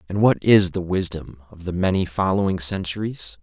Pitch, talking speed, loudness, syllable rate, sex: 95 Hz, 175 wpm, -21 LUFS, 5.1 syllables/s, male